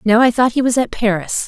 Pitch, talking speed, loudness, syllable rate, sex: 230 Hz, 285 wpm, -15 LUFS, 5.8 syllables/s, female